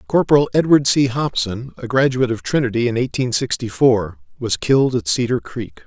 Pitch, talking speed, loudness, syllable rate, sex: 120 Hz, 175 wpm, -18 LUFS, 5.4 syllables/s, male